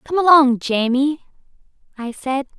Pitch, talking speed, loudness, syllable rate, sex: 275 Hz, 115 wpm, -17 LUFS, 4.2 syllables/s, female